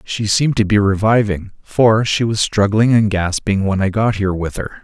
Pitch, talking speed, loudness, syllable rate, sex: 105 Hz, 210 wpm, -16 LUFS, 5.1 syllables/s, male